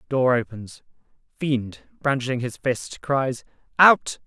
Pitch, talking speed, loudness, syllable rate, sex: 130 Hz, 100 wpm, -22 LUFS, 3.7 syllables/s, male